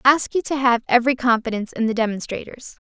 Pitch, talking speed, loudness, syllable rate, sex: 245 Hz, 210 wpm, -20 LUFS, 6.8 syllables/s, female